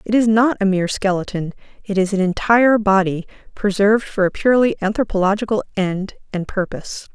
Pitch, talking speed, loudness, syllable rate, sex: 200 Hz, 160 wpm, -18 LUFS, 5.9 syllables/s, female